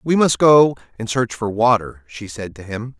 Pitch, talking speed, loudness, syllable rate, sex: 115 Hz, 220 wpm, -16 LUFS, 4.5 syllables/s, male